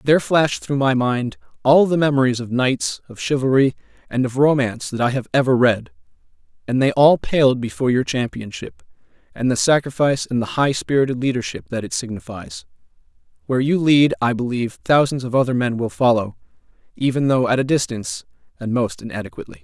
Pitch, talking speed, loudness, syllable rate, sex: 130 Hz, 175 wpm, -19 LUFS, 5.9 syllables/s, male